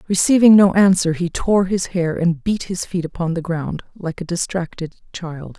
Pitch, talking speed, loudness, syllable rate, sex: 175 Hz, 195 wpm, -18 LUFS, 4.7 syllables/s, female